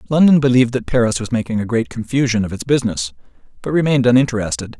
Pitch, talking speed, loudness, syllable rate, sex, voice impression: 125 Hz, 190 wpm, -17 LUFS, 7.3 syllables/s, male, masculine, slightly young, slightly tensed, bright, intellectual, sincere, friendly, slightly lively